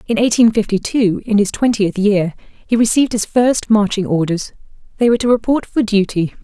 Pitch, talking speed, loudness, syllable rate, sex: 215 Hz, 185 wpm, -15 LUFS, 5.5 syllables/s, female